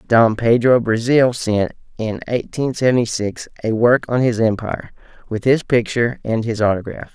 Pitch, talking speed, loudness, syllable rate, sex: 115 Hz, 170 wpm, -18 LUFS, 5.1 syllables/s, male